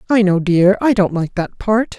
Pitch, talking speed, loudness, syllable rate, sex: 200 Hz, 240 wpm, -15 LUFS, 4.6 syllables/s, female